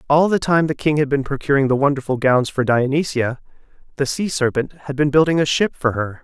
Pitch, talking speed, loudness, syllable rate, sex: 140 Hz, 220 wpm, -18 LUFS, 5.7 syllables/s, male